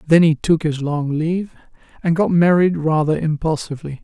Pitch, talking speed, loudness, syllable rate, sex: 160 Hz, 165 wpm, -18 LUFS, 5.3 syllables/s, male